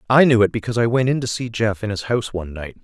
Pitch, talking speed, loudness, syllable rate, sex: 110 Hz, 320 wpm, -19 LUFS, 7.3 syllables/s, male